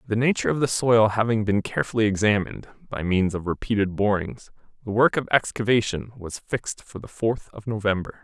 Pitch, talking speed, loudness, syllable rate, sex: 105 Hz, 180 wpm, -23 LUFS, 5.8 syllables/s, male